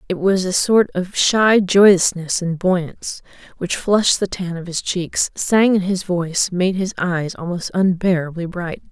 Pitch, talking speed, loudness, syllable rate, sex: 180 Hz, 175 wpm, -18 LUFS, 4.2 syllables/s, female